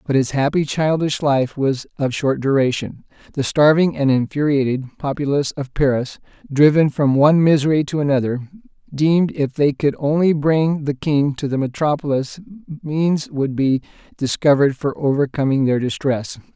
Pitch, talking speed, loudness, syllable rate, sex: 145 Hz, 150 wpm, -18 LUFS, 4.9 syllables/s, male